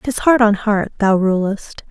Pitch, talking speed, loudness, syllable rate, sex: 210 Hz, 190 wpm, -16 LUFS, 4.0 syllables/s, female